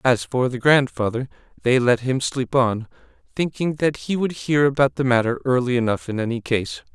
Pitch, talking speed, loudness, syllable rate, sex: 130 Hz, 190 wpm, -21 LUFS, 5.1 syllables/s, male